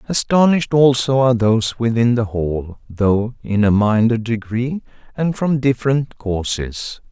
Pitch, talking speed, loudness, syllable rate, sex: 120 Hz, 135 wpm, -17 LUFS, 4.4 syllables/s, male